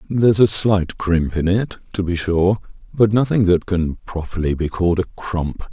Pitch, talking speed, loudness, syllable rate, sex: 95 Hz, 190 wpm, -19 LUFS, 4.6 syllables/s, male